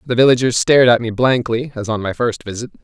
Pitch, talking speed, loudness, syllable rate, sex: 120 Hz, 235 wpm, -15 LUFS, 6.2 syllables/s, male